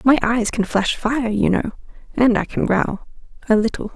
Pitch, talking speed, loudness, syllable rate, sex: 225 Hz, 180 wpm, -19 LUFS, 4.7 syllables/s, female